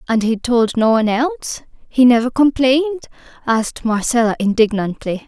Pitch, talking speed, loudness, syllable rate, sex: 240 Hz, 125 wpm, -16 LUFS, 5.6 syllables/s, female